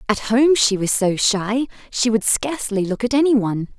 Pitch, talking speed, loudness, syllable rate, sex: 230 Hz, 205 wpm, -18 LUFS, 5.1 syllables/s, female